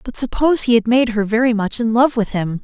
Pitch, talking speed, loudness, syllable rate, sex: 230 Hz, 275 wpm, -16 LUFS, 5.9 syllables/s, female